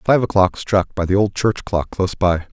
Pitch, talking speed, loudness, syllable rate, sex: 95 Hz, 230 wpm, -18 LUFS, 5.0 syllables/s, male